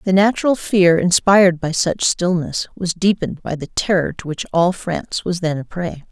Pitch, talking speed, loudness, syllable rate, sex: 180 Hz, 195 wpm, -18 LUFS, 5.0 syllables/s, female